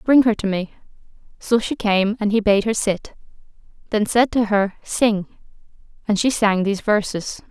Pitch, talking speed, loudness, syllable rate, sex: 210 Hz, 175 wpm, -19 LUFS, 4.8 syllables/s, female